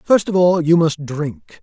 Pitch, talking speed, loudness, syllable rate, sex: 160 Hz, 220 wpm, -16 LUFS, 3.9 syllables/s, male